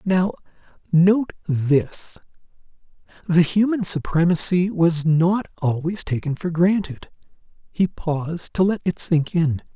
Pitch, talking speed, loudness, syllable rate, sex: 170 Hz, 115 wpm, -20 LUFS, 3.8 syllables/s, male